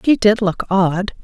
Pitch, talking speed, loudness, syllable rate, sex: 200 Hz, 195 wpm, -16 LUFS, 4.0 syllables/s, female